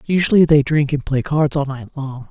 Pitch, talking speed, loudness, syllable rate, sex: 145 Hz, 235 wpm, -17 LUFS, 5.2 syllables/s, female